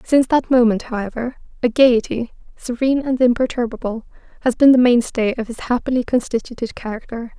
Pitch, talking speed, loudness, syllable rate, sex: 240 Hz, 145 wpm, -18 LUFS, 5.8 syllables/s, female